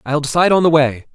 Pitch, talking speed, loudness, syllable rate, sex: 150 Hz, 260 wpm, -14 LUFS, 7.1 syllables/s, male